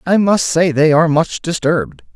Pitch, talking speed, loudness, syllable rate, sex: 160 Hz, 195 wpm, -14 LUFS, 5.1 syllables/s, male